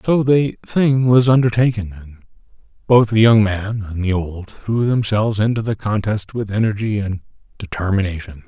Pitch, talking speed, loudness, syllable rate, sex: 105 Hz, 155 wpm, -17 LUFS, 4.8 syllables/s, male